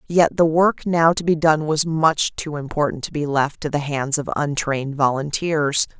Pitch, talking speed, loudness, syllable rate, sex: 150 Hz, 200 wpm, -20 LUFS, 4.6 syllables/s, female